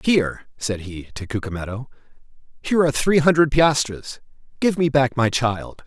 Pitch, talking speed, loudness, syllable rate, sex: 130 Hz, 155 wpm, -20 LUFS, 5.1 syllables/s, male